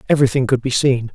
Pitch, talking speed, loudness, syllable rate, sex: 130 Hz, 210 wpm, -17 LUFS, 7.2 syllables/s, male